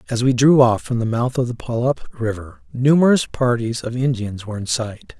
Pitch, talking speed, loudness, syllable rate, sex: 120 Hz, 210 wpm, -19 LUFS, 5.1 syllables/s, male